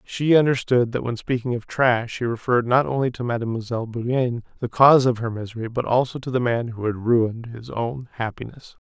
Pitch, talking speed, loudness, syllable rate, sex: 120 Hz, 205 wpm, -22 LUFS, 5.8 syllables/s, male